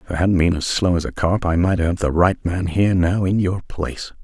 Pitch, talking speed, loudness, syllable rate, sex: 90 Hz, 285 wpm, -19 LUFS, 5.7 syllables/s, male